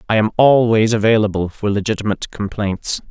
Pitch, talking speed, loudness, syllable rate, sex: 105 Hz, 135 wpm, -16 LUFS, 5.7 syllables/s, male